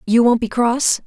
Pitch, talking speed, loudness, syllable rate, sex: 235 Hz, 225 wpm, -16 LUFS, 4.4 syllables/s, female